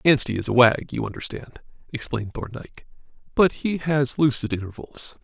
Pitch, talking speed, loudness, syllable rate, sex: 130 Hz, 150 wpm, -23 LUFS, 5.3 syllables/s, male